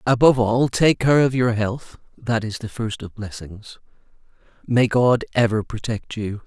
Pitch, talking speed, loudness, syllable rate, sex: 115 Hz, 165 wpm, -20 LUFS, 4.4 syllables/s, male